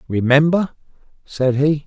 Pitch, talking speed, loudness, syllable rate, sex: 145 Hz, 95 wpm, -17 LUFS, 4.2 syllables/s, male